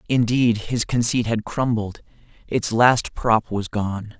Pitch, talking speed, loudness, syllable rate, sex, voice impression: 115 Hz, 145 wpm, -21 LUFS, 3.7 syllables/s, male, very masculine, slightly young, slightly thick, slightly relaxed, powerful, bright, slightly hard, very clear, fluent, cool, slightly intellectual, very refreshing, sincere, calm, mature, very friendly, very reassuring, unique, elegant, slightly wild, sweet, lively, kind, slightly modest, slightly light